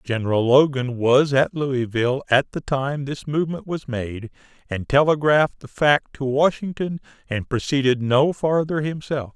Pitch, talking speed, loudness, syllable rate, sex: 140 Hz, 150 wpm, -21 LUFS, 4.6 syllables/s, male